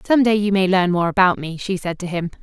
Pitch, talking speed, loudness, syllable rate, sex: 190 Hz, 295 wpm, -18 LUFS, 6.1 syllables/s, female